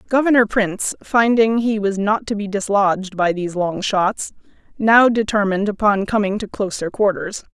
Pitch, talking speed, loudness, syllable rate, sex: 205 Hz, 160 wpm, -18 LUFS, 4.9 syllables/s, female